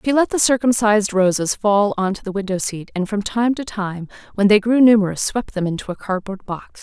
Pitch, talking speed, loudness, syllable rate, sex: 205 Hz, 230 wpm, -18 LUFS, 5.5 syllables/s, female